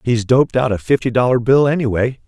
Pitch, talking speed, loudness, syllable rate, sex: 125 Hz, 210 wpm, -15 LUFS, 6.1 syllables/s, male